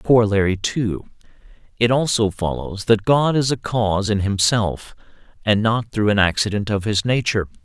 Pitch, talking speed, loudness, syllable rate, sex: 105 Hz, 150 wpm, -19 LUFS, 5.0 syllables/s, male